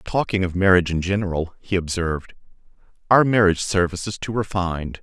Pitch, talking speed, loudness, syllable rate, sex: 95 Hz, 155 wpm, -21 LUFS, 6.2 syllables/s, male